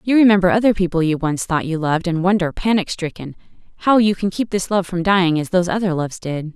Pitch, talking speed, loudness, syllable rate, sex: 180 Hz, 240 wpm, -18 LUFS, 6.4 syllables/s, female